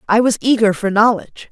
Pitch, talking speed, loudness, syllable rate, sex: 215 Hz, 200 wpm, -15 LUFS, 6.1 syllables/s, female